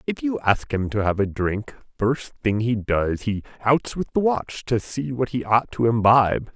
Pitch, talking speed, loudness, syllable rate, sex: 115 Hz, 220 wpm, -22 LUFS, 4.4 syllables/s, male